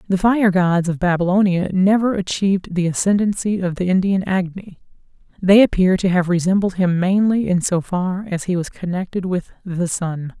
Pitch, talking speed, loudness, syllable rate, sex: 185 Hz, 175 wpm, -18 LUFS, 5.0 syllables/s, female